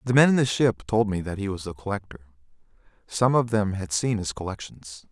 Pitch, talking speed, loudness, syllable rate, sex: 105 Hz, 225 wpm, -25 LUFS, 5.7 syllables/s, male